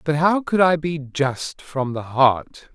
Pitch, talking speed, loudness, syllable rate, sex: 150 Hz, 195 wpm, -20 LUFS, 3.6 syllables/s, male